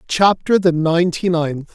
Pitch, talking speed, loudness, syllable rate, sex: 170 Hz, 135 wpm, -16 LUFS, 4.4 syllables/s, male